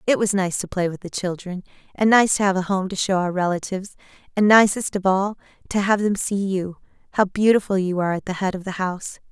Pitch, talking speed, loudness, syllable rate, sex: 190 Hz, 230 wpm, -21 LUFS, 6.0 syllables/s, female